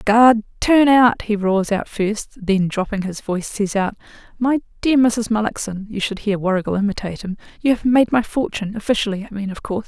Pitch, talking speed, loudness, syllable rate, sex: 215 Hz, 195 wpm, -19 LUFS, 4.6 syllables/s, female